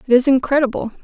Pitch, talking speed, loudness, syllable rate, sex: 260 Hz, 175 wpm, -16 LUFS, 7.4 syllables/s, female